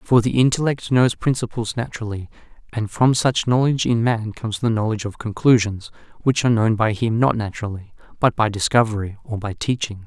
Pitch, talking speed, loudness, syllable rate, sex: 115 Hz, 180 wpm, -20 LUFS, 5.8 syllables/s, male